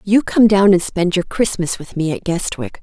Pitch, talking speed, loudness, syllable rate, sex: 185 Hz, 235 wpm, -16 LUFS, 4.8 syllables/s, female